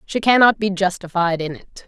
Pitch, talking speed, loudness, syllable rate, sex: 190 Hz, 195 wpm, -17 LUFS, 5.2 syllables/s, female